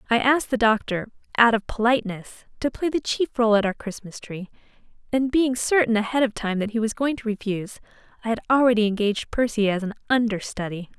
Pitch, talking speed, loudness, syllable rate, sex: 225 Hz, 195 wpm, -23 LUFS, 6.2 syllables/s, female